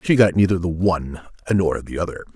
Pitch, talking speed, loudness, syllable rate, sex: 90 Hz, 205 wpm, -20 LUFS, 5.8 syllables/s, male